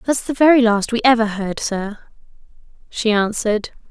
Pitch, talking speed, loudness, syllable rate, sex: 225 Hz, 155 wpm, -17 LUFS, 5.0 syllables/s, female